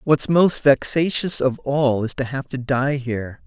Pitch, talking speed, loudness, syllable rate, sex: 140 Hz, 190 wpm, -20 LUFS, 4.2 syllables/s, male